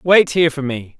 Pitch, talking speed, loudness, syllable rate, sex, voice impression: 150 Hz, 240 wpm, -16 LUFS, 5.3 syllables/s, male, masculine, slightly adult-like, fluent, cool, slightly refreshing, slightly calm, slightly sweet